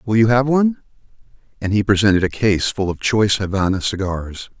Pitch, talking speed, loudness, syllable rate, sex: 105 Hz, 185 wpm, -18 LUFS, 5.7 syllables/s, male